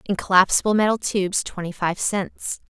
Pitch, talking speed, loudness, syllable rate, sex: 195 Hz, 155 wpm, -21 LUFS, 5.2 syllables/s, female